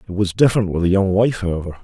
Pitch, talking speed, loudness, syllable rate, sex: 95 Hz, 260 wpm, -18 LUFS, 6.7 syllables/s, male